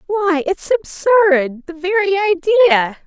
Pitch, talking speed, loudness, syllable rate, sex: 360 Hz, 115 wpm, -15 LUFS, 5.2 syllables/s, female